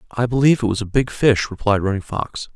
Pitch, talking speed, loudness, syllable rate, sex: 115 Hz, 235 wpm, -19 LUFS, 6.1 syllables/s, male